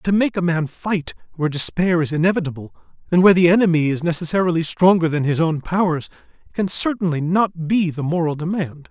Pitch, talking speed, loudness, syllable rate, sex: 170 Hz, 180 wpm, -19 LUFS, 5.9 syllables/s, male